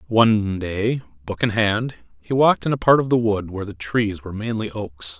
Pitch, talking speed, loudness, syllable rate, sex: 105 Hz, 220 wpm, -21 LUFS, 5.2 syllables/s, male